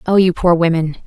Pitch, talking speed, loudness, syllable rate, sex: 170 Hz, 225 wpm, -14 LUFS, 6.0 syllables/s, female